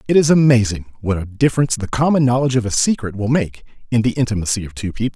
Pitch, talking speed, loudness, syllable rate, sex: 115 Hz, 235 wpm, -17 LUFS, 7.2 syllables/s, male